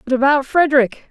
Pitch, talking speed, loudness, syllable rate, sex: 270 Hz, 165 wpm, -15 LUFS, 5.9 syllables/s, female